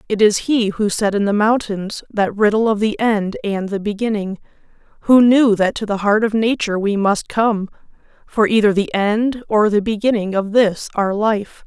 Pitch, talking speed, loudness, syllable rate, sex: 210 Hz, 190 wpm, -17 LUFS, 4.7 syllables/s, female